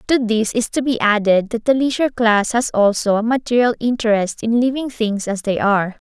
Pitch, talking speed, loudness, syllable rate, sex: 230 Hz, 205 wpm, -17 LUFS, 5.3 syllables/s, female